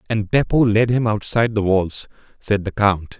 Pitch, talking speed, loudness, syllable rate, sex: 105 Hz, 190 wpm, -18 LUFS, 4.8 syllables/s, male